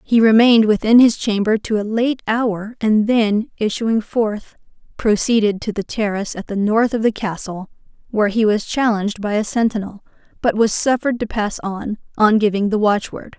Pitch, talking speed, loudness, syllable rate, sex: 215 Hz, 185 wpm, -17 LUFS, 5.0 syllables/s, female